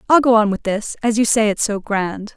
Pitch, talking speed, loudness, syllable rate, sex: 215 Hz, 280 wpm, -17 LUFS, 5.2 syllables/s, female